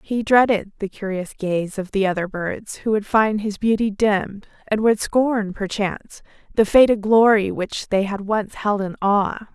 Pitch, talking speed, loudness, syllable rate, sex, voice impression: 205 Hz, 180 wpm, -20 LUFS, 4.4 syllables/s, female, feminine, slightly adult-like, clear, sincere, friendly, slightly kind